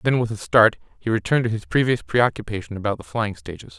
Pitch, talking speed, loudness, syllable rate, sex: 110 Hz, 220 wpm, -21 LUFS, 6.3 syllables/s, male